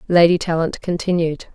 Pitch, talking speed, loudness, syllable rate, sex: 170 Hz, 115 wpm, -18 LUFS, 5.2 syllables/s, female